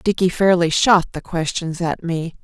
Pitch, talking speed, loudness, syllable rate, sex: 175 Hz, 175 wpm, -18 LUFS, 4.6 syllables/s, female